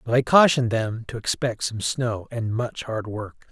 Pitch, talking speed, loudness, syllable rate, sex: 115 Hz, 205 wpm, -23 LUFS, 4.5 syllables/s, male